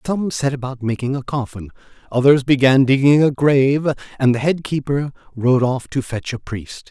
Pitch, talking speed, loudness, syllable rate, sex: 135 Hz, 180 wpm, -18 LUFS, 4.9 syllables/s, male